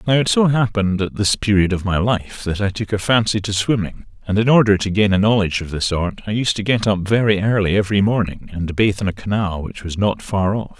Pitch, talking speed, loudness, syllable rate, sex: 100 Hz, 255 wpm, -18 LUFS, 5.8 syllables/s, male